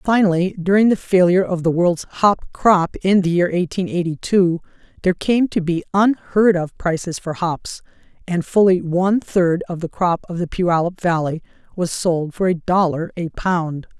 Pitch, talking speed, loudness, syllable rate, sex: 180 Hz, 180 wpm, -18 LUFS, 4.7 syllables/s, female